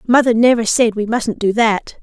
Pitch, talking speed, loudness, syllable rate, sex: 225 Hz, 205 wpm, -15 LUFS, 4.9 syllables/s, female